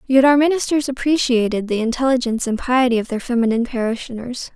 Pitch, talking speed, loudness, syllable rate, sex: 245 Hz, 160 wpm, -18 LUFS, 6.3 syllables/s, female